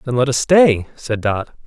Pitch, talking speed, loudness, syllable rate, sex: 130 Hz, 215 wpm, -16 LUFS, 4.3 syllables/s, male